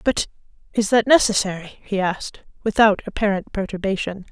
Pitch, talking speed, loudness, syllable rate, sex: 205 Hz, 125 wpm, -20 LUFS, 5.4 syllables/s, female